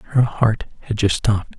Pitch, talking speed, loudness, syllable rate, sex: 110 Hz, 190 wpm, -20 LUFS, 5.7 syllables/s, male